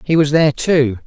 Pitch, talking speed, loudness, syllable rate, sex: 145 Hz, 225 wpm, -14 LUFS, 5.4 syllables/s, male